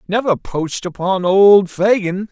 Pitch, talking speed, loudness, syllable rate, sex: 195 Hz, 130 wpm, -15 LUFS, 4.2 syllables/s, male